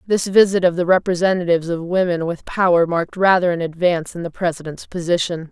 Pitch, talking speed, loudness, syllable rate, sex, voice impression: 175 Hz, 185 wpm, -18 LUFS, 6.1 syllables/s, female, feminine, adult-like, tensed, powerful, slightly hard, clear, fluent, intellectual, slightly elegant, slightly strict, slightly sharp